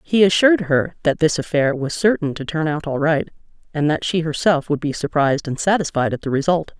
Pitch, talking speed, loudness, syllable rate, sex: 160 Hz, 220 wpm, -19 LUFS, 5.7 syllables/s, female